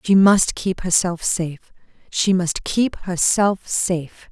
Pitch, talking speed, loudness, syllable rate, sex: 185 Hz, 125 wpm, -19 LUFS, 4.1 syllables/s, female